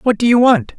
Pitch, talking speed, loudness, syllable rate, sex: 225 Hz, 305 wpm, -12 LUFS, 5.8 syllables/s, male